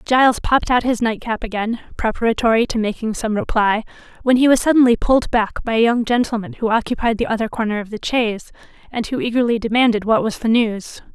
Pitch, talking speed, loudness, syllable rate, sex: 230 Hz, 200 wpm, -18 LUFS, 6.1 syllables/s, female